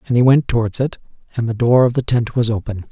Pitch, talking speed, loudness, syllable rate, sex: 120 Hz, 270 wpm, -17 LUFS, 6.4 syllables/s, male